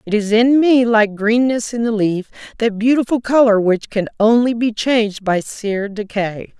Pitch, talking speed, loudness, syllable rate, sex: 220 Hz, 175 wpm, -16 LUFS, 4.6 syllables/s, female